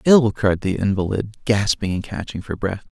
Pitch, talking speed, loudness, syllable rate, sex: 105 Hz, 185 wpm, -21 LUFS, 4.8 syllables/s, male